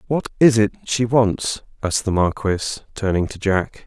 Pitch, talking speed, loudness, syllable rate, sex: 105 Hz, 170 wpm, -20 LUFS, 4.9 syllables/s, male